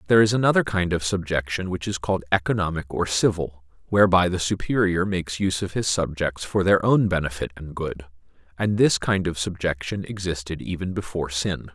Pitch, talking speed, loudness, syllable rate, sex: 90 Hz, 180 wpm, -23 LUFS, 5.7 syllables/s, male